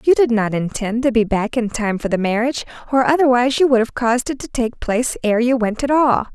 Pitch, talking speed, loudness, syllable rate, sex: 240 Hz, 255 wpm, -18 LUFS, 6.0 syllables/s, female